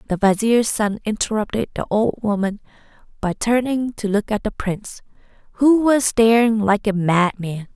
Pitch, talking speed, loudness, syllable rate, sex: 215 Hz, 155 wpm, -19 LUFS, 4.7 syllables/s, female